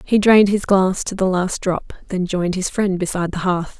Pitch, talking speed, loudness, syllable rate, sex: 185 Hz, 235 wpm, -18 LUFS, 5.4 syllables/s, female